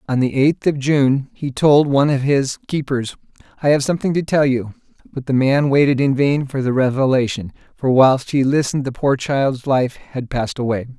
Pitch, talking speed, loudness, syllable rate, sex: 135 Hz, 200 wpm, -17 LUFS, 5.1 syllables/s, male